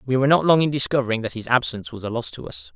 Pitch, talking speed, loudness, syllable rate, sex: 125 Hz, 305 wpm, -21 LUFS, 7.8 syllables/s, male